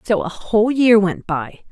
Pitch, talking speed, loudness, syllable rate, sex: 205 Hz, 210 wpm, -17 LUFS, 4.6 syllables/s, female